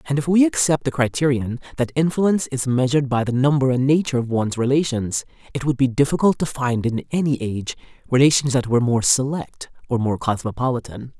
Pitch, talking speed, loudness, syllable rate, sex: 135 Hz, 190 wpm, -20 LUFS, 6.0 syllables/s, female